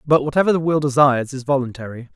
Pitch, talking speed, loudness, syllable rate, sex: 140 Hz, 195 wpm, -18 LUFS, 6.9 syllables/s, male